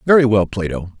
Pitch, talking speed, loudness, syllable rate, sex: 110 Hz, 180 wpm, -16 LUFS, 5.9 syllables/s, male